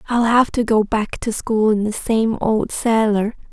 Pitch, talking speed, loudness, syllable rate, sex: 220 Hz, 205 wpm, -18 LUFS, 4.2 syllables/s, female